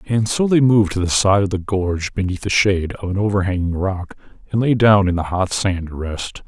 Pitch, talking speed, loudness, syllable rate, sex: 100 Hz, 240 wpm, -18 LUFS, 5.5 syllables/s, male